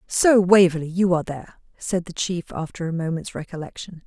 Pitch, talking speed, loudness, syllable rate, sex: 175 Hz, 175 wpm, -21 LUFS, 5.7 syllables/s, female